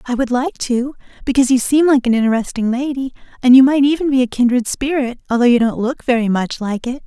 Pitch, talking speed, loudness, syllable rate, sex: 255 Hz, 230 wpm, -16 LUFS, 6.1 syllables/s, female